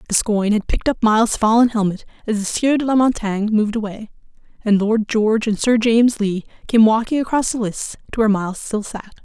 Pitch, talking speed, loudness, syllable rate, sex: 220 Hz, 210 wpm, -18 LUFS, 6.1 syllables/s, female